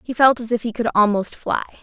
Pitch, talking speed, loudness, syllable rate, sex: 230 Hz, 265 wpm, -19 LUFS, 5.8 syllables/s, female